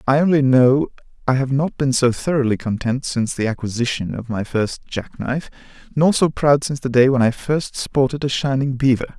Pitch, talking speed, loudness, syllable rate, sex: 130 Hz, 195 wpm, -19 LUFS, 5.4 syllables/s, male